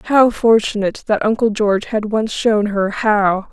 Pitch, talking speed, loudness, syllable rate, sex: 215 Hz, 170 wpm, -16 LUFS, 4.6 syllables/s, female